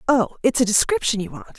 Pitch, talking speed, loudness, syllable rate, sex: 235 Hz, 225 wpm, -20 LUFS, 6.3 syllables/s, female